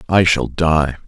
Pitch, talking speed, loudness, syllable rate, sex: 80 Hz, 165 wpm, -16 LUFS, 3.6 syllables/s, male